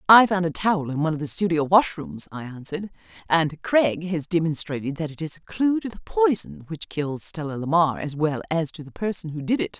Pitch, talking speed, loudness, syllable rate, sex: 165 Hz, 225 wpm, -24 LUFS, 5.7 syllables/s, female